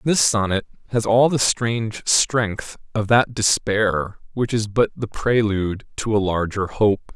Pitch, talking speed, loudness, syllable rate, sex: 110 Hz, 170 wpm, -20 LUFS, 4.1 syllables/s, male